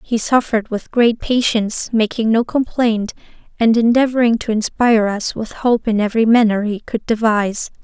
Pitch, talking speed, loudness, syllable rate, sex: 225 Hz, 160 wpm, -16 LUFS, 5.2 syllables/s, female